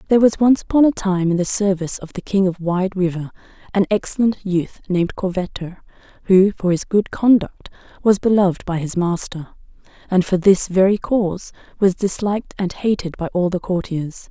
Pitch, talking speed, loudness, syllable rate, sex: 190 Hz, 180 wpm, -18 LUFS, 5.4 syllables/s, female